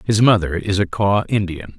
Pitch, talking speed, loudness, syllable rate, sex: 95 Hz, 200 wpm, -18 LUFS, 4.9 syllables/s, male